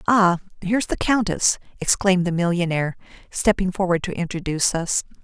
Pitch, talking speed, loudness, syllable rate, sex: 180 Hz, 135 wpm, -21 LUFS, 5.8 syllables/s, female